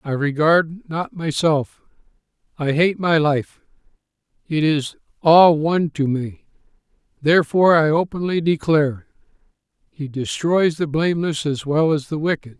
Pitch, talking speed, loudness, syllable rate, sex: 155 Hz, 130 wpm, -19 LUFS, 4.5 syllables/s, male